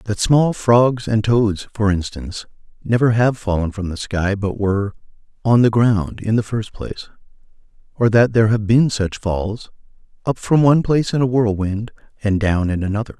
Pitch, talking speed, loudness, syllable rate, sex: 110 Hz, 175 wpm, -18 LUFS, 5.0 syllables/s, male